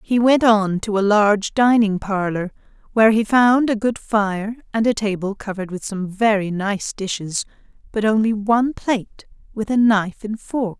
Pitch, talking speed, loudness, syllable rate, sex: 210 Hz, 180 wpm, -19 LUFS, 4.8 syllables/s, female